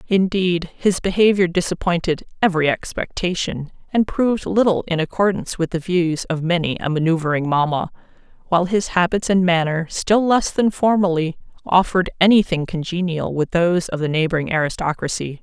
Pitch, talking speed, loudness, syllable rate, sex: 175 Hz, 150 wpm, -19 LUFS, 5.5 syllables/s, female